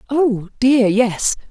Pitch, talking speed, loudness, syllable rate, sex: 235 Hz, 120 wpm, -16 LUFS, 2.8 syllables/s, female